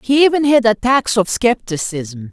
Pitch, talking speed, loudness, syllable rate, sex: 225 Hz, 155 wpm, -15 LUFS, 4.5 syllables/s, female